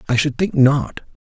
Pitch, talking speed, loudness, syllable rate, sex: 135 Hz, 195 wpm, -17 LUFS, 4.3 syllables/s, male